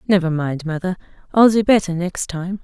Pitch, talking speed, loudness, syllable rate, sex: 180 Hz, 180 wpm, -18 LUFS, 5.2 syllables/s, female